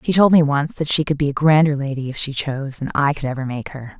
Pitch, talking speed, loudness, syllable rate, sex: 145 Hz, 300 wpm, -19 LUFS, 6.3 syllables/s, female